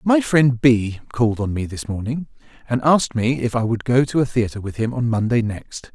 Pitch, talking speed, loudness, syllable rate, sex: 120 Hz, 230 wpm, -20 LUFS, 5.3 syllables/s, male